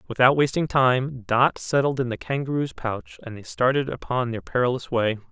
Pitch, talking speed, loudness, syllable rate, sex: 125 Hz, 180 wpm, -23 LUFS, 5.0 syllables/s, male